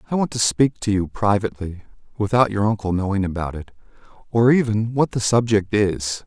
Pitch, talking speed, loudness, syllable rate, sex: 105 Hz, 180 wpm, -20 LUFS, 5.4 syllables/s, male